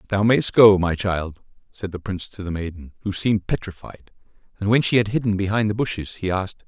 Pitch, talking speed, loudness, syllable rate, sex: 100 Hz, 215 wpm, -21 LUFS, 6.0 syllables/s, male